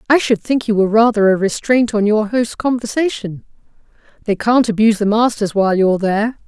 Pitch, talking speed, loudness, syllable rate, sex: 220 Hz, 185 wpm, -15 LUFS, 5.9 syllables/s, female